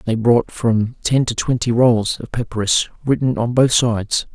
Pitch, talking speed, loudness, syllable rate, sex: 115 Hz, 180 wpm, -17 LUFS, 4.5 syllables/s, male